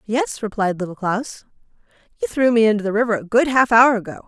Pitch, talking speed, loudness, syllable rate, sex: 225 Hz, 210 wpm, -18 LUFS, 5.9 syllables/s, female